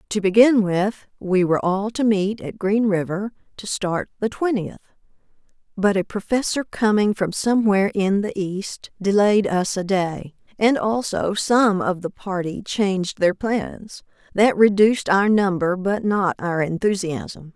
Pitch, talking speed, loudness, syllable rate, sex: 200 Hz, 155 wpm, -20 LUFS, 4.2 syllables/s, female